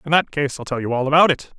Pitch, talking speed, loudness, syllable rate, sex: 145 Hz, 340 wpm, -19 LUFS, 7.0 syllables/s, male